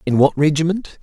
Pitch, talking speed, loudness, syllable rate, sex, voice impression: 155 Hz, 175 wpm, -17 LUFS, 5.6 syllables/s, male, very masculine, very adult-like, very middle-aged, very thick, very tensed, very powerful, bright, soft, very clear, fluent, very cool, very intellectual, slightly refreshing, very sincere, very calm, very mature, friendly, very reassuring, very unique, very elegant, slightly wild, sweet, very lively, very kind, slightly intense